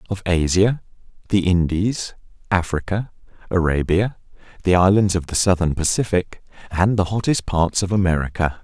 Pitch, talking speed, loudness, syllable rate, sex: 95 Hz, 125 wpm, -20 LUFS, 5.0 syllables/s, male